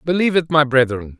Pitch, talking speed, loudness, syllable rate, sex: 145 Hz, 200 wpm, -16 LUFS, 6.7 syllables/s, male